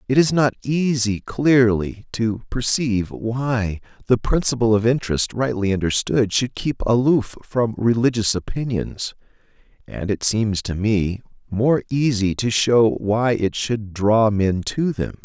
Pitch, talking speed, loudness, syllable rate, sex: 115 Hz, 140 wpm, -20 LUFS, 4.0 syllables/s, male